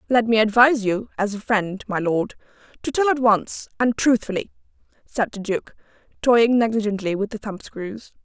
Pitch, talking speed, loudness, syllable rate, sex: 220 Hz, 175 wpm, -21 LUFS, 5.0 syllables/s, female